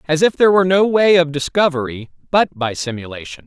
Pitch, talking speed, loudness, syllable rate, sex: 155 Hz, 190 wpm, -16 LUFS, 6.1 syllables/s, male